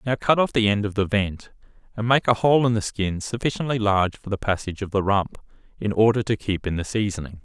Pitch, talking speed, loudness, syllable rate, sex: 105 Hz, 240 wpm, -22 LUFS, 6.0 syllables/s, male